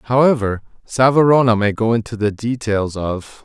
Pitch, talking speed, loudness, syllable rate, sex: 115 Hz, 140 wpm, -17 LUFS, 5.0 syllables/s, male